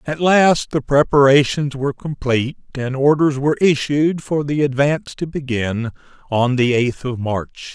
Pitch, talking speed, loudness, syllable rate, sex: 140 Hz, 155 wpm, -17 LUFS, 4.6 syllables/s, male